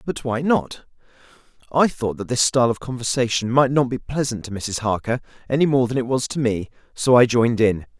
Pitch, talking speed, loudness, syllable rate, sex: 125 Hz, 210 wpm, -20 LUFS, 5.6 syllables/s, male